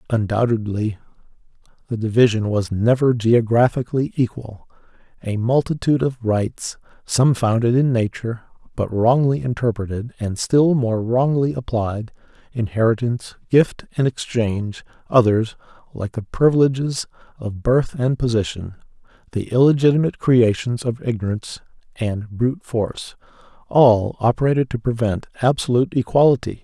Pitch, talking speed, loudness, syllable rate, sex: 120 Hz, 110 wpm, -19 LUFS, 4.9 syllables/s, male